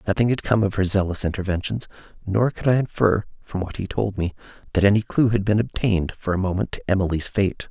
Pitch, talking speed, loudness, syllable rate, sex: 100 Hz, 220 wpm, -22 LUFS, 6.2 syllables/s, male